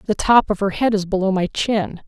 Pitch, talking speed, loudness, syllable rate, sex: 200 Hz, 260 wpm, -18 LUFS, 5.3 syllables/s, female